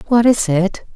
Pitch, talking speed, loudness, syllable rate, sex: 210 Hz, 190 wpm, -15 LUFS, 4.3 syllables/s, female